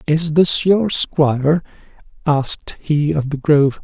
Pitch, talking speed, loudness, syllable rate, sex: 155 Hz, 140 wpm, -17 LUFS, 4.0 syllables/s, male